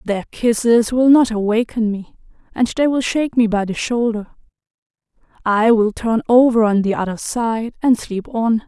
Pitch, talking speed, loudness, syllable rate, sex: 230 Hz, 175 wpm, -17 LUFS, 4.6 syllables/s, female